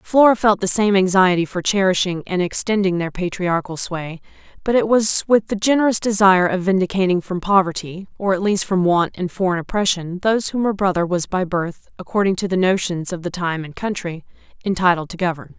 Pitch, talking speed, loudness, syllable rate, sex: 185 Hz, 195 wpm, -19 LUFS, 5.5 syllables/s, female